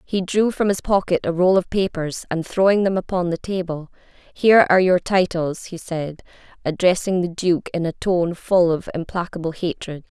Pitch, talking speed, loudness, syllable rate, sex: 175 Hz, 180 wpm, -20 LUFS, 5.1 syllables/s, female